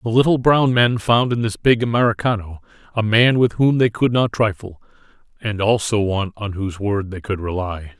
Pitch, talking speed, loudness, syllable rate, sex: 110 Hz, 195 wpm, -18 LUFS, 5.1 syllables/s, male